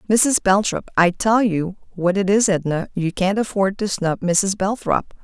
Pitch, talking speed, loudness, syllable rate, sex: 195 Hz, 185 wpm, -19 LUFS, 4.4 syllables/s, female